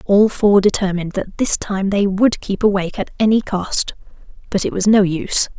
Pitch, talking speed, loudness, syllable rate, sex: 200 Hz, 195 wpm, -17 LUFS, 5.2 syllables/s, female